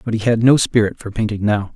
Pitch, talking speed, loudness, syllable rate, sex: 110 Hz, 275 wpm, -17 LUFS, 6.1 syllables/s, male